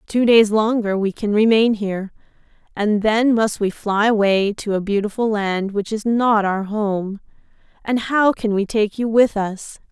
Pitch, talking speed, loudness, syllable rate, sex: 210 Hz, 180 wpm, -18 LUFS, 4.3 syllables/s, female